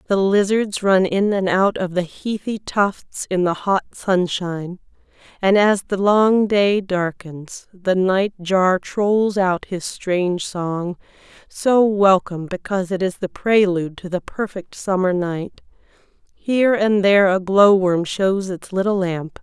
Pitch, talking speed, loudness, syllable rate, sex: 190 Hz, 150 wpm, -19 LUFS, 3.9 syllables/s, female